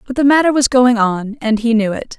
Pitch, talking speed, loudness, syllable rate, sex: 240 Hz, 275 wpm, -14 LUFS, 5.4 syllables/s, female